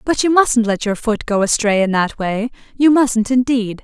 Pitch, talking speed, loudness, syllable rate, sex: 230 Hz, 220 wpm, -16 LUFS, 4.6 syllables/s, female